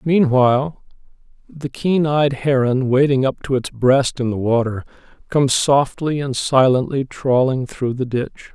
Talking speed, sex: 145 wpm, male